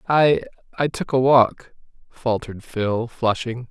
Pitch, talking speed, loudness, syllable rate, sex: 120 Hz, 115 wpm, -21 LUFS, 3.9 syllables/s, male